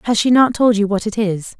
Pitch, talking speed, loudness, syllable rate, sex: 215 Hz, 300 wpm, -15 LUFS, 5.7 syllables/s, female